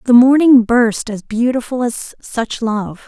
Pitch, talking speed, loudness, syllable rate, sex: 235 Hz, 155 wpm, -14 LUFS, 3.8 syllables/s, female